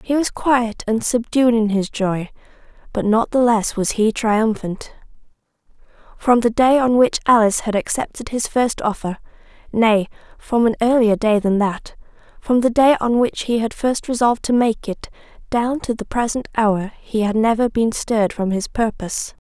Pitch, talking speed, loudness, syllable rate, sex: 225 Hz, 175 wpm, -18 LUFS, 4.7 syllables/s, female